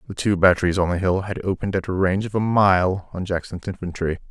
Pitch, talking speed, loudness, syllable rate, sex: 95 Hz, 235 wpm, -21 LUFS, 6.3 syllables/s, male